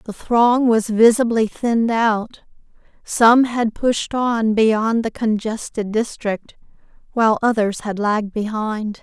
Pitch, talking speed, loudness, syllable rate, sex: 225 Hz, 125 wpm, -18 LUFS, 3.8 syllables/s, female